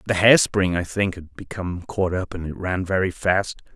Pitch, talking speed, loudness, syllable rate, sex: 90 Hz, 225 wpm, -22 LUFS, 5.0 syllables/s, male